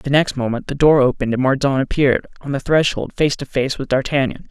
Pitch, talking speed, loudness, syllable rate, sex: 135 Hz, 225 wpm, -18 LUFS, 6.0 syllables/s, male